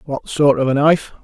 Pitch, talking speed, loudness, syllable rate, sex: 145 Hz, 245 wpm, -16 LUFS, 5.8 syllables/s, male